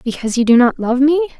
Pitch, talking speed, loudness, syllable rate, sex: 260 Hz, 260 wpm, -14 LUFS, 6.6 syllables/s, female